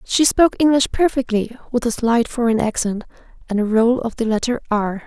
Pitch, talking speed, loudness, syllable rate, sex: 235 Hz, 190 wpm, -18 LUFS, 5.4 syllables/s, female